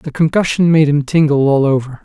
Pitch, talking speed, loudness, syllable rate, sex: 150 Hz, 205 wpm, -13 LUFS, 5.5 syllables/s, male